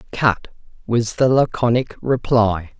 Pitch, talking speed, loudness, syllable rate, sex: 115 Hz, 105 wpm, -18 LUFS, 3.7 syllables/s, female